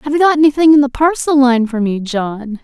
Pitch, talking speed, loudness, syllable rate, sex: 270 Hz, 250 wpm, -13 LUFS, 5.6 syllables/s, female